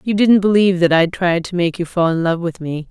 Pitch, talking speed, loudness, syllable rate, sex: 175 Hz, 290 wpm, -16 LUFS, 5.7 syllables/s, female